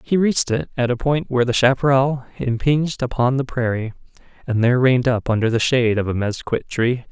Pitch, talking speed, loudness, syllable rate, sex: 125 Hz, 200 wpm, -19 LUFS, 6.1 syllables/s, male